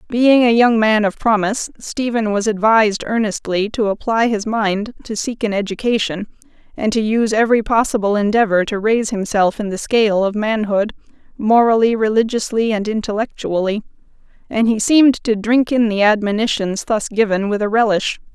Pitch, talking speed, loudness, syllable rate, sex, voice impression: 215 Hz, 160 wpm, -16 LUFS, 5.3 syllables/s, female, feminine, adult-like, slightly relaxed, powerful, slightly bright, fluent, raspy, intellectual, unique, lively, slightly light